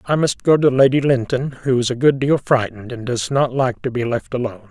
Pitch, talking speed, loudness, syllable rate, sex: 130 Hz, 255 wpm, -18 LUFS, 5.7 syllables/s, male